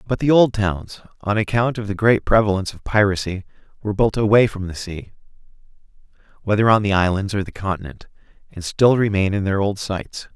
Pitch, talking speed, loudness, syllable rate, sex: 100 Hz, 185 wpm, -19 LUFS, 5.9 syllables/s, male